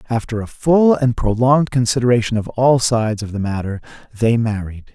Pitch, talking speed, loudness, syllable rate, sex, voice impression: 120 Hz, 170 wpm, -17 LUFS, 5.4 syllables/s, male, very masculine, very adult-like, very thick, tensed, very powerful, bright, soft, slightly muffled, fluent, slightly raspy, cool, refreshing, sincere, very calm, mature, very friendly, very reassuring, unique, elegant, slightly wild, sweet, lively, very kind, slightly modest